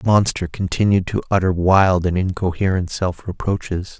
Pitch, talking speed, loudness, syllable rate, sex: 90 Hz, 150 wpm, -19 LUFS, 4.9 syllables/s, male